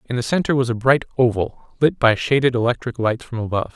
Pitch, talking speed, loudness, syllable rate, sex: 125 Hz, 225 wpm, -19 LUFS, 6.0 syllables/s, male